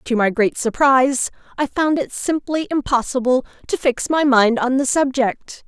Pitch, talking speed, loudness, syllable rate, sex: 265 Hz, 170 wpm, -18 LUFS, 4.6 syllables/s, female